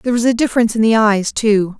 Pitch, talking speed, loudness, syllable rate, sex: 220 Hz, 270 wpm, -14 LUFS, 6.9 syllables/s, female